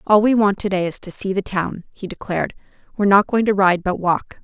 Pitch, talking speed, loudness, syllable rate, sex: 195 Hz, 255 wpm, -19 LUFS, 5.8 syllables/s, female